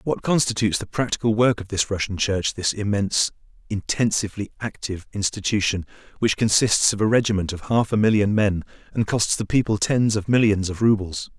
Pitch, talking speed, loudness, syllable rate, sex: 105 Hz, 175 wpm, -22 LUFS, 5.6 syllables/s, male